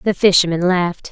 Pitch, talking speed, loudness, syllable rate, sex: 180 Hz, 160 wpm, -15 LUFS, 6.1 syllables/s, female